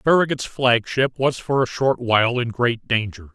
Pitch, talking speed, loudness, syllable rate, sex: 120 Hz, 195 wpm, -20 LUFS, 4.5 syllables/s, male